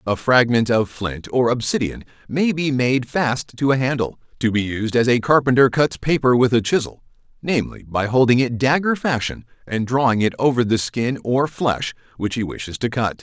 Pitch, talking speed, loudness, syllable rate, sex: 125 Hz, 195 wpm, -19 LUFS, 5.0 syllables/s, male